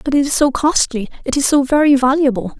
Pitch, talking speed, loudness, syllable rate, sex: 270 Hz, 210 wpm, -15 LUFS, 6.0 syllables/s, female